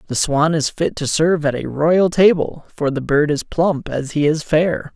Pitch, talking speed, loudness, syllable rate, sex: 155 Hz, 230 wpm, -17 LUFS, 4.5 syllables/s, male